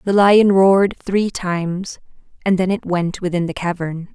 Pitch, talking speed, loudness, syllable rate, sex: 185 Hz, 175 wpm, -17 LUFS, 4.6 syllables/s, female